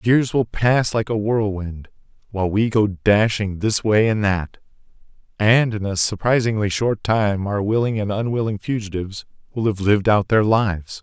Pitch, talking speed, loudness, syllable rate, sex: 105 Hz, 170 wpm, -19 LUFS, 4.8 syllables/s, male